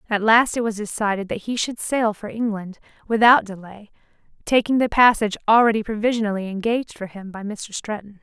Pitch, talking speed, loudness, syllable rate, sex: 215 Hz, 175 wpm, -20 LUFS, 5.8 syllables/s, female